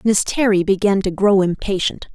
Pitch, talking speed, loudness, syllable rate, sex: 200 Hz, 170 wpm, -17 LUFS, 4.9 syllables/s, female